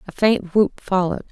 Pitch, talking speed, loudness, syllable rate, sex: 190 Hz, 180 wpm, -19 LUFS, 5.6 syllables/s, female